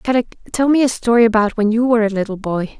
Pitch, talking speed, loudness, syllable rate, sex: 225 Hz, 255 wpm, -16 LUFS, 6.8 syllables/s, female